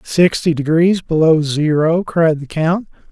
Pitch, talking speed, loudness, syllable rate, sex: 160 Hz, 135 wpm, -15 LUFS, 3.9 syllables/s, male